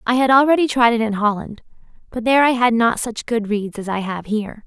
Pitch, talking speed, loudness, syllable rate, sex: 230 Hz, 245 wpm, -18 LUFS, 5.9 syllables/s, female